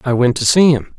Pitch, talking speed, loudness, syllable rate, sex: 140 Hz, 305 wpm, -13 LUFS, 5.7 syllables/s, male